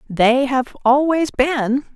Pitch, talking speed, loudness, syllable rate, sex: 265 Hz, 125 wpm, -17 LUFS, 3.3 syllables/s, female